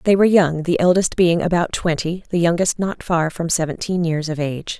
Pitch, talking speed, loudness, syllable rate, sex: 170 Hz, 215 wpm, -19 LUFS, 5.4 syllables/s, female